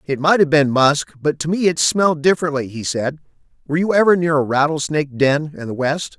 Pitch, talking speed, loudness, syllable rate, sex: 150 Hz, 225 wpm, -17 LUFS, 5.9 syllables/s, male